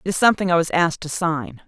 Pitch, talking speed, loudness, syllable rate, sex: 165 Hz, 285 wpm, -20 LUFS, 7.1 syllables/s, female